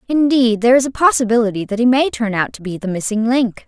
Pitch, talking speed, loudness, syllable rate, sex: 235 Hz, 245 wpm, -16 LUFS, 6.3 syllables/s, female